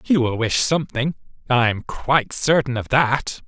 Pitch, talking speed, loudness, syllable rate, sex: 130 Hz, 175 wpm, -20 LUFS, 4.7 syllables/s, male